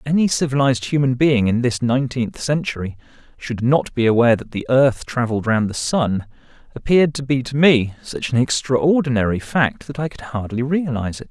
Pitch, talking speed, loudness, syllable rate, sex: 125 Hz, 185 wpm, -19 LUFS, 5.6 syllables/s, male